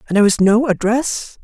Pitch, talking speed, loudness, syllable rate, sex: 220 Hz, 210 wpm, -15 LUFS, 5.7 syllables/s, male